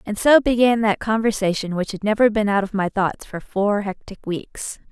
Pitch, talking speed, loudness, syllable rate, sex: 210 Hz, 205 wpm, -20 LUFS, 5.0 syllables/s, female